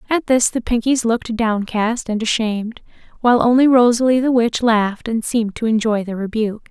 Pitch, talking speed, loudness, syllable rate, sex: 230 Hz, 180 wpm, -17 LUFS, 5.6 syllables/s, female